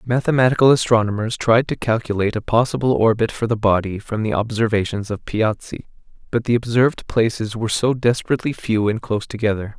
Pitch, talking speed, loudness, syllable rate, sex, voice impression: 115 Hz, 165 wpm, -19 LUFS, 6.1 syllables/s, male, very masculine, very adult-like, thick, tensed, slightly powerful, bright, slightly hard, clear, fluent, cool, very intellectual, refreshing, sincere, calm, slightly mature, friendly, reassuring, unique, elegant, slightly wild, sweet, slightly lively, kind, slightly intense, slightly modest